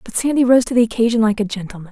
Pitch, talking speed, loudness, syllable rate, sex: 225 Hz, 280 wpm, -16 LUFS, 7.7 syllables/s, female